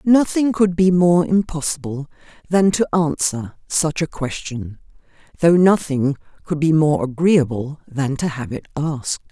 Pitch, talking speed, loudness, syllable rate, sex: 155 Hz, 140 wpm, -19 LUFS, 4.2 syllables/s, female